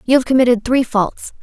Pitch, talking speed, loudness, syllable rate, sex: 245 Hz, 210 wpm, -15 LUFS, 5.5 syllables/s, female